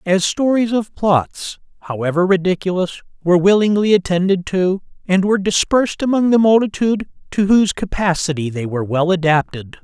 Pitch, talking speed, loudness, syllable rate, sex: 185 Hz, 140 wpm, -16 LUFS, 5.5 syllables/s, male